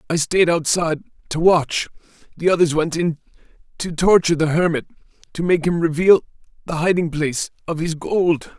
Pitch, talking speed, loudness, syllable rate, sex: 165 Hz, 120 wpm, -19 LUFS, 5.4 syllables/s, male